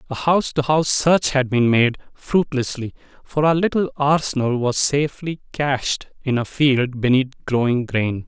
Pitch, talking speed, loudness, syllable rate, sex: 135 Hz, 150 wpm, -19 LUFS, 4.8 syllables/s, male